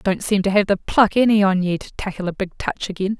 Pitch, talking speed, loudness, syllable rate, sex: 195 Hz, 280 wpm, -19 LUFS, 5.8 syllables/s, female